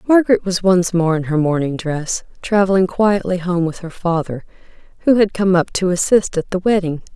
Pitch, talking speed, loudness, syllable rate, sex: 180 Hz, 195 wpm, -17 LUFS, 5.2 syllables/s, female